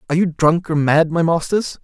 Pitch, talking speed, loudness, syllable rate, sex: 165 Hz, 230 wpm, -17 LUFS, 5.5 syllables/s, male